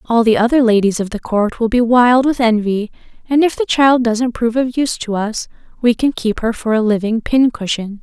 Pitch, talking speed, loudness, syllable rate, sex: 235 Hz, 225 wpm, -15 LUFS, 5.2 syllables/s, female